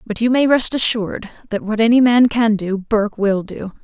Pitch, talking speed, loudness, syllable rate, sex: 220 Hz, 220 wpm, -16 LUFS, 5.2 syllables/s, female